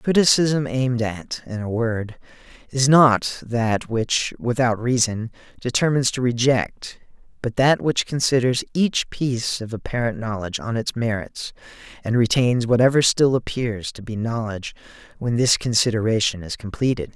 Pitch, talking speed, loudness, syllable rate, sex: 120 Hz, 145 wpm, -21 LUFS, 4.8 syllables/s, male